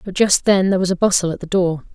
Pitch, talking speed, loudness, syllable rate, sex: 185 Hz, 310 wpm, -17 LUFS, 6.8 syllables/s, female